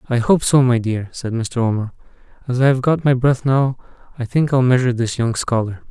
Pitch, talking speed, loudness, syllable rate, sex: 125 Hz, 225 wpm, -17 LUFS, 5.5 syllables/s, male